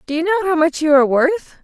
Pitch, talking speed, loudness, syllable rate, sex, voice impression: 325 Hz, 295 wpm, -15 LUFS, 8.3 syllables/s, female, very feminine, slightly young, very thin, tensed, slightly relaxed, weak, bright, soft, very clear, very fluent, slightly raspy, very cute, intellectual, very refreshing, sincere, slightly calm, very friendly, very reassuring, very elegant, slightly wild, sweet, lively, kind, slightly sharp